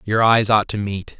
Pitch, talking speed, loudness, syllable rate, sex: 105 Hz, 250 wpm, -18 LUFS, 4.6 syllables/s, male